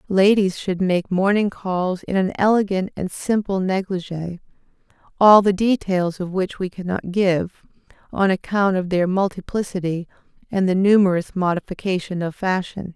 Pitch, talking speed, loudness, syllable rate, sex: 190 Hz, 140 wpm, -20 LUFS, 4.7 syllables/s, female